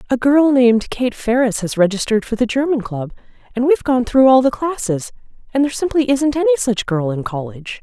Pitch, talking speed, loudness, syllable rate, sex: 240 Hz, 205 wpm, -16 LUFS, 5.9 syllables/s, female